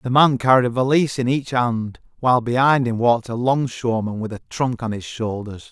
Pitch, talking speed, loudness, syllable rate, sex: 120 Hz, 210 wpm, -20 LUFS, 5.7 syllables/s, male